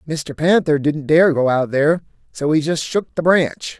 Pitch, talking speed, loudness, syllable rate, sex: 150 Hz, 205 wpm, -17 LUFS, 4.5 syllables/s, male